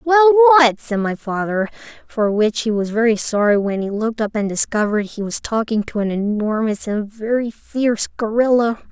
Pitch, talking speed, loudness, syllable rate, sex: 230 Hz, 180 wpm, -18 LUFS, 5.1 syllables/s, female